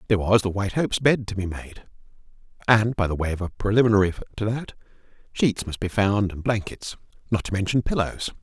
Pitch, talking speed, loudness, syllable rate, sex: 105 Hz, 200 wpm, -23 LUFS, 6.1 syllables/s, male